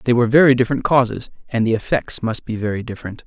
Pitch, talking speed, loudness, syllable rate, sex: 120 Hz, 220 wpm, -18 LUFS, 7.1 syllables/s, male